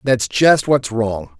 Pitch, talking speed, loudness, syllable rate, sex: 120 Hz, 170 wpm, -16 LUFS, 3.2 syllables/s, male